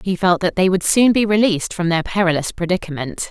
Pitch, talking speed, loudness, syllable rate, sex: 185 Hz, 220 wpm, -17 LUFS, 5.9 syllables/s, female